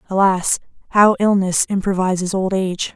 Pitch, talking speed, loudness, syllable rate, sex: 190 Hz, 120 wpm, -17 LUFS, 5.1 syllables/s, female